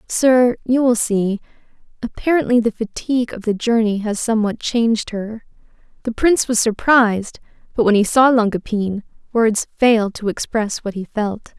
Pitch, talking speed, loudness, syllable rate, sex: 225 Hz, 160 wpm, -18 LUFS, 5.0 syllables/s, female